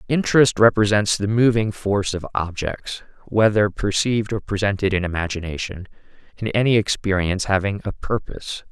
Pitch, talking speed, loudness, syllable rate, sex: 100 Hz, 115 wpm, -20 LUFS, 5.4 syllables/s, male